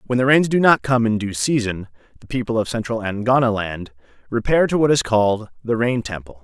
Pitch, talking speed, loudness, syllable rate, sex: 115 Hz, 205 wpm, -19 LUFS, 5.7 syllables/s, male